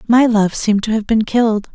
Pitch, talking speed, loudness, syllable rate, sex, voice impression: 220 Hz, 240 wpm, -15 LUFS, 5.7 syllables/s, female, very feminine, slightly middle-aged, thin, slightly tensed, slightly weak, slightly bright, slightly hard, clear, fluent, slightly raspy, slightly cool, intellectual, slightly refreshing, slightly sincere, slightly calm, slightly friendly, slightly reassuring, very unique, elegant, wild, sweet, lively, strict, sharp, light